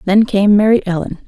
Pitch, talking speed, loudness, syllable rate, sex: 200 Hz, 190 wpm, -13 LUFS, 5.7 syllables/s, female